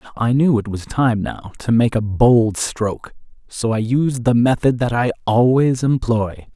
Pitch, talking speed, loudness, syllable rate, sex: 120 Hz, 185 wpm, -17 LUFS, 4.2 syllables/s, male